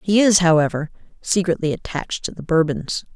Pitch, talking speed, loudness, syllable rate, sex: 170 Hz, 150 wpm, -19 LUFS, 5.6 syllables/s, female